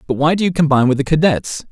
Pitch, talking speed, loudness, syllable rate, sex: 150 Hz, 280 wpm, -15 LUFS, 7.1 syllables/s, male